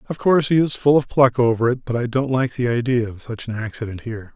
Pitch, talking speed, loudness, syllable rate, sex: 125 Hz, 275 wpm, -19 LUFS, 6.3 syllables/s, male